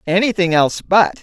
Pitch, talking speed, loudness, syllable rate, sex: 185 Hz, 145 wpm, -15 LUFS, 5.3 syllables/s, female